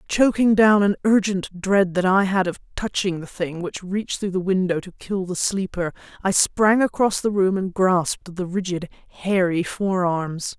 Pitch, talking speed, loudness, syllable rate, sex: 190 Hz, 180 wpm, -21 LUFS, 4.5 syllables/s, female